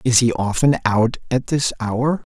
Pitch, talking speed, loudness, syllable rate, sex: 125 Hz, 180 wpm, -19 LUFS, 4.3 syllables/s, male